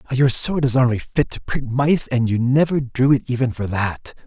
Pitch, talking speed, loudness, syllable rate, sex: 125 Hz, 225 wpm, -19 LUFS, 4.8 syllables/s, male